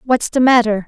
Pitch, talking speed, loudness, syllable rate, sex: 235 Hz, 205 wpm, -14 LUFS, 5.2 syllables/s, female